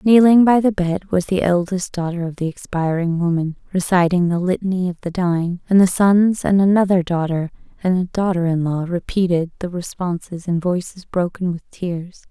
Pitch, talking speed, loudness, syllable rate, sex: 180 Hz, 180 wpm, -19 LUFS, 5.1 syllables/s, female